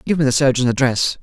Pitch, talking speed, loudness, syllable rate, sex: 130 Hz, 245 wpm, -16 LUFS, 6.4 syllables/s, male